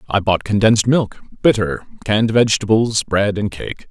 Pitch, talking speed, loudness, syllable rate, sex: 105 Hz, 155 wpm, -17 LUFS, 5.1 syllables/s, male